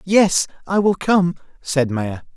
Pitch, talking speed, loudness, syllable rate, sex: 170 Hz, 155 wpm, -19 LUFS, 3.5 syllables/s, male